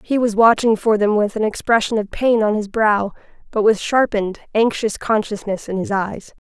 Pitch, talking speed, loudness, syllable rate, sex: 215 Hz, 195 wpm, -18 LUFS, 5.1 syllables/s, female